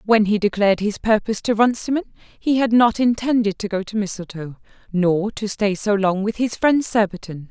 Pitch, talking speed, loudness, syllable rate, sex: 210 Hz, 190 wpm, -19 LUFS, 5.2 syllables/s, female